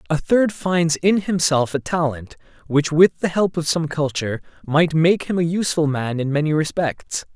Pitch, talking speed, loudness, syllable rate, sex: 160 Hz, 190 wpm, -19 LUFS, 4.8 syllables/s, male